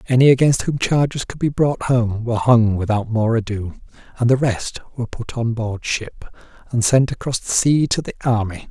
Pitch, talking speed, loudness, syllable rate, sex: 120 Hz, 200 wpm, -19 LUFS, 5.2 syllables/s, male